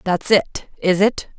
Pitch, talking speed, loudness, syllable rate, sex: 190 Hz, 175 wpm, -18 LUFS, 3.5 syllables/s, female